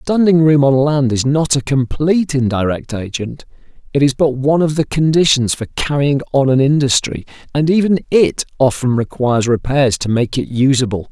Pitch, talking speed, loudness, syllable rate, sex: 140 Hz, 175 wpm, -15 LUFS, 5.2 syllables/s, male